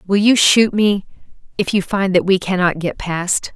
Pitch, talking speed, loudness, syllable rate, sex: 190 Hz, 200 wpm, -16 LUFS, 4.3 syllables/s, female